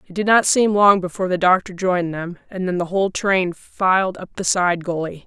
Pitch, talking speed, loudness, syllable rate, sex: 185 Hz, 230 wpm, -19 LUFS, 5.5 syllables/s, female